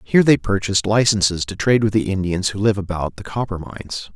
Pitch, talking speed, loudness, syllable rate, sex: 100 Hz, 215 wpm, -19 LUFS, 6.2 syllables/s, male